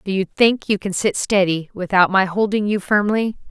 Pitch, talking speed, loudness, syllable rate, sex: 195 Hz, 205 wpm, -18 LUFS, 4.9 syllables/s, female